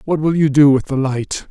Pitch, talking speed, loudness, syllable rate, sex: 145 Hz, 280 wpm, -15 LUFS, 5.0 syllables/s, male